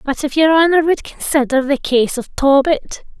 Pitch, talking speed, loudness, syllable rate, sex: 285 Hz, 190 wpm, -15 LUFS, 4.7 syllables/s, female